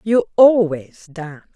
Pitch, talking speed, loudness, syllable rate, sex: 180 Hz, 115 wpm, -14 LUFS, 3.9 syllables/s, female